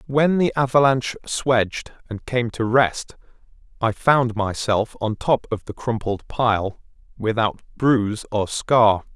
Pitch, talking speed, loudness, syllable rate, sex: 115 Hz, 140 wpm, -21 LUFS, 3.9 syllables/s, male